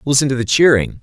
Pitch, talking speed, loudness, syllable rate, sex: 130 Hz, 235 wpm, -14 LUFS, 6.5 syllables/s, male